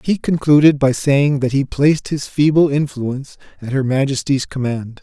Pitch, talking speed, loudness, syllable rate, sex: 140 Hz, 165 wpm, -16 LUFS, 4.9 syllables/s, male